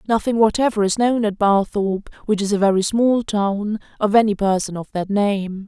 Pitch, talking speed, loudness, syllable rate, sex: 205 Hz, 170 wpm, -19 LUFS, 5.1 syllables/s, female